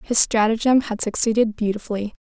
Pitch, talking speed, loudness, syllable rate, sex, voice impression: 220 Hz, 135 wpm, -20 LUFS, 5.9 syllables/s, female, feminine, slightly adult-like, fluent, slightly cute, slightly sincere, slightly calm, friendly